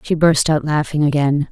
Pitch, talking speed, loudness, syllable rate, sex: 150 Hz, 200 wpm, -16 LUFS, 5.0 syllables/s, female